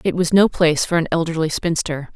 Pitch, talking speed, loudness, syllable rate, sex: 165 Hz, 225 wpm, -18 LUFS, 5.9 syllables/s, female